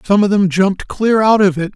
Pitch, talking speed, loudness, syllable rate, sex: 195 Hz, 275 wpm, -13 LUFS, 5.7 syllables/s, male